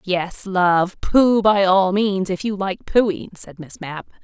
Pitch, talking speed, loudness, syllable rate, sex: 190 Hz, 185 wpm, -18 LUFS, 3.5 syllables/s, female